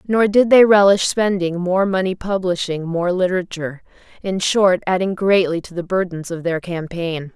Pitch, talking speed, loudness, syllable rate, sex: 185 Hz, 165 wpm, -18 LUFS, 4.9 syllables/s, female